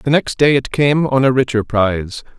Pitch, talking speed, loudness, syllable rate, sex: 130 Hz, 225 wpm, -15 LUFS, 4.9 syllables/s, male